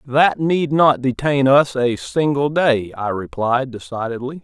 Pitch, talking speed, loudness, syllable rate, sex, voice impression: 135 Hz, 150 wpm, -18 LUFS, 4.0 syllables/s, male, masculine, middle-aged, slightly weak, clear, slightly halting, intellectual, sincere, mature, slightly wild, slightly strict